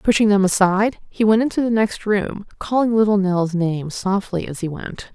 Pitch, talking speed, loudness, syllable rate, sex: 200 Hz, 200 wpm, -19 LUFS, 5.0 syllables/s, female